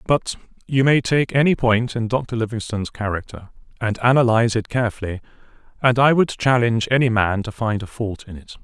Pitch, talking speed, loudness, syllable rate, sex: 115 Hz, 180 wpm, -19 LUFS, 5.7 syllables/s, male